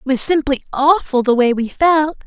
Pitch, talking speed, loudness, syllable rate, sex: 280 Hz, 210 wpm, -15 LUFS, 4.9 syllables/s, female